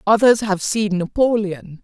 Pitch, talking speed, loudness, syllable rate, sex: 205 Hz, 130 wpm, -18 LUFS, 4.1 syllables/s, female